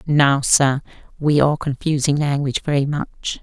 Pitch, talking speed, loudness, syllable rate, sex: 145 Hz, 140 wpm, -19 LUFS, 4.8 syllables/s, female